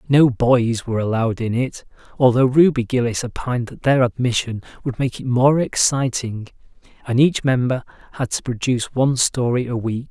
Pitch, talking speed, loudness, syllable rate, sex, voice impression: 125 Hz, 155 wpm, -19 LUFS, 5.3 syllables/s, male, masculine, adult-like, bright, slightly hard, halting, slightly refreshing, friendly, slightly reassuring, unique, kind, modest